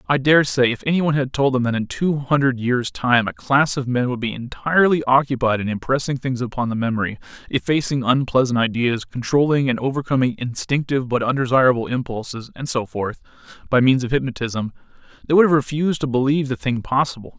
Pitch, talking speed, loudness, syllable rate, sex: 130 Hz, 185 wpm, -20 LUFS, 6.1 syllables/s, male